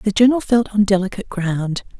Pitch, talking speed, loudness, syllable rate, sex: 205 Hz, 180 wpm, -18 LUFS, 6.2 syllables/s, female